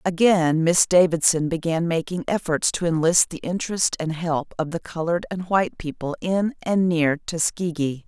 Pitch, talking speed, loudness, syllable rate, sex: 170 Hz, 165 wpm, -22 LUFS, 4.8 syllables/s, female